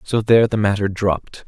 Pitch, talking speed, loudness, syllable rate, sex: 105 Hz, 205 wpm, -18 LUFS, 5.8 syllables/s, male